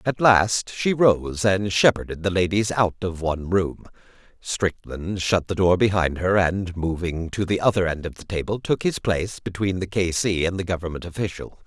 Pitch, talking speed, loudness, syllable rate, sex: 95 Hz, 195 wpm, -22 LUFS, 4.9 syllables/s, male